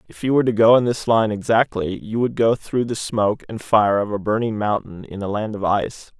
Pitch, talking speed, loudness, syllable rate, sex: 110 Hz, 250 wpm, -20 LUFS, 5.6 syllables/s, male